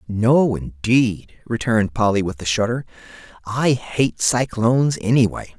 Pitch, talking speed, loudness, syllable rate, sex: 115 Hz, 120 wpm, -19 LUFS, 4.2 syllables/s, male